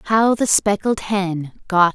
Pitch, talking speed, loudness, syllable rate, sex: 200 Hz, 155 wpm, -18 LUFS, 3.2 syllables/s, female